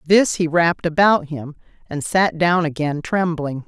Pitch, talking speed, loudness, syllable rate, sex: 165 Hz, 165 wpm, -18 LUFS, 4.3 syllables/s, female